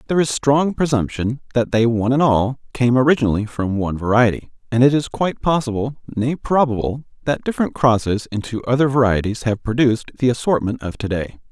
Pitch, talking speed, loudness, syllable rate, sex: 125 Hz, 175 wpm, -19 LUFS, 6.0 syllables/s, male